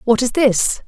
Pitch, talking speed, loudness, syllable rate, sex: 240 Hz, 205 wpm, -16 LUFS, 4.0 syllables/s, female